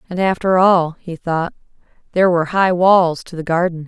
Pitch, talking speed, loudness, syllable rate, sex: 175 Hz, 185 wpm, -16 LUFS, 5.2 syllables/s, female